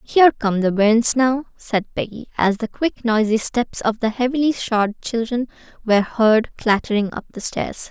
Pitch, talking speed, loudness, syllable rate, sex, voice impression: 230 Hz, 175 wpm, -19 LUFS, 4.5 syllables/s, female, gender-neutral, young, tensed, slightly powerful, bright, soft, slightly fluent, cute, intellectual, friendly, slightly sweet, lively, kind